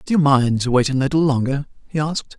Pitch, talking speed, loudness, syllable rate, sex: 140 Hz, 225 wpm, -19 LUFS, 6.3 syllables/s, male